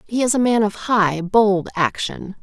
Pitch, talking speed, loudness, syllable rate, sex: 205 Hz, 200 wpm, -18 LUFS, 4.0 syllables/s, female